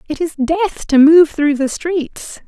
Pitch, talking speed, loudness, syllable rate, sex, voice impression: 310 Hz, 195 wpm, -14 LUFS, 3.6 syllables/s, female, feminine, slightly adult-like, slightly fluent, slightly calm, friendly, reassuring, slightly kind